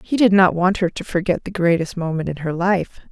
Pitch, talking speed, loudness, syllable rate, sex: 180 Hz, 250 wpm, -19 LUFS, 5.5 syllables/s, female